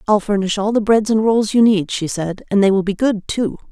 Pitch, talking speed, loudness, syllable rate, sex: 205 Hz, 275 wpm, -17 LUFS, 5.3 syllables/s, female